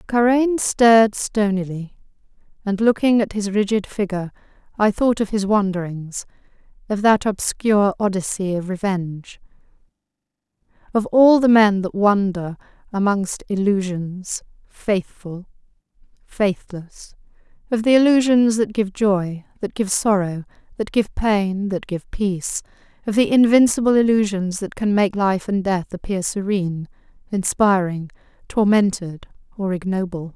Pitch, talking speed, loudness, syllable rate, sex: 200 Hz, 120 wpm, -19 LUFS, 4.4 syllables/s, female